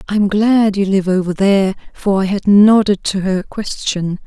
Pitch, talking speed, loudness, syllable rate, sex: 200 Hz, 195 wpm, -14 LUFS, 4.7 syllables/s, female